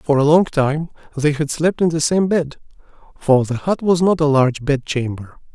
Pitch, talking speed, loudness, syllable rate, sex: 150 Hz, 205 wpm, -17 LUFS, 4.8 syllables/s, male